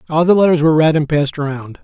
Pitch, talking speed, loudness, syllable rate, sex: 155 Hz, 260 wpm, -14 LUFS, 7.4 syllables/s, male